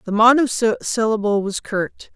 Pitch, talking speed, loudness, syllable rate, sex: 220 Hz, 110 wpm, -18 LUFS, 4.2 syllables/s, female